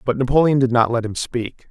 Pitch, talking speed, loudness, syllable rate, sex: 125 Hz, 245 wpm, -18 LUFS, 5.6 syllables/s, male